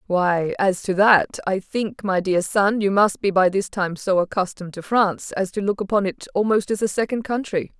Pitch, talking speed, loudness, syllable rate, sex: 195 Hz, 215 wpm, -21 LUFS, 5.0 syllables/s, female